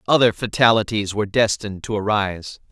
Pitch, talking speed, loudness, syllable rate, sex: 105 Hz, 135 wpm, -19 LUFS, 6.1 syllables/s, male